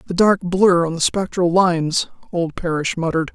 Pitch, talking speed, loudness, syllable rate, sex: 175 Hz, 180 wpm, -18 LUFS, 5.1 syllables/s, female